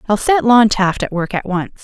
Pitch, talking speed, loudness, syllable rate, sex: 210 Hz, 260 wpm, -15 LUFS, 4.9 syllables/s, female